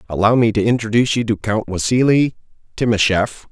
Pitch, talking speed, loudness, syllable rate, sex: 115 Hz, 155 wpm, -17 LUFS, 5.9 syllables/s, male